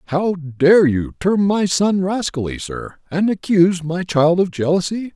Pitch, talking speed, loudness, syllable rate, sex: 175 Hz, 165 wpm, -17 LUFS, 4.2 syllables/s, male